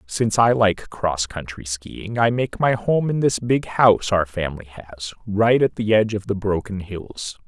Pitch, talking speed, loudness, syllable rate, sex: 105 Hz, 195 wpm, -21 LUFS, 4.5 syllables/s, male